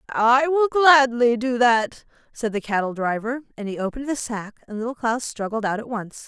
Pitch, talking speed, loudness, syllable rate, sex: 235 Hz, 200 wpm, -21 LUFS, 5.0 syllables/s, female